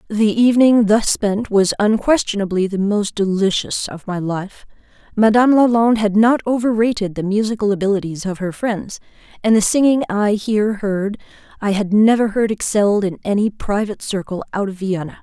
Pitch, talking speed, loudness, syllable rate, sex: 210 Hz, 160 wpm, -17 LUFS, 5.3 syllables/s, female